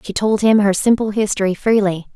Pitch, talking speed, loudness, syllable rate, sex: 205 Hz, 195 wpm, -16 LUFS, 5.6 syllables/s, female